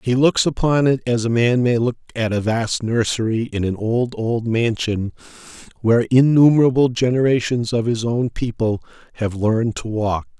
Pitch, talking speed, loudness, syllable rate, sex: 120 Hz, 165 wpm, -19 LUFS, 4.9 syllables/s, male